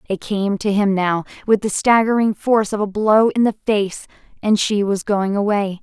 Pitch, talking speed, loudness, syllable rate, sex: 205 Hz, 195 wpm, -18 LUFS, 4.9 syllables/s, female